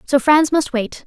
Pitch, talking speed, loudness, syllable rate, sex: 280 Hz, 225 wpm, -16 LUFS, 4.4 syllables/s, female